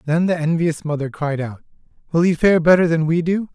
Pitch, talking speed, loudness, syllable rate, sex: 160 Hz, 220 wpm, -18 LUFS, 5.6 syllables/s, male